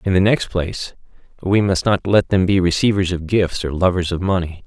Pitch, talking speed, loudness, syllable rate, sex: 90 Hz, 220 wpm, -18 LUFS, 5.3 syllables/s, male